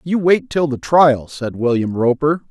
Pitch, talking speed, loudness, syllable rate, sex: 145 Hz, 190 wpm, -16 LUFS, 4.2 syllables/s, male